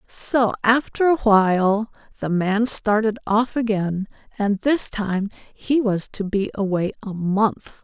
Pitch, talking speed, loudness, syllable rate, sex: 210 Hz, 145 wpm, -21 LUFS, 3.6 syllables/s, female